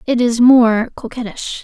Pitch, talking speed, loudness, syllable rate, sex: 235 Hz, 145 wpm, -13 LUFS, 4.1 syllables/s, female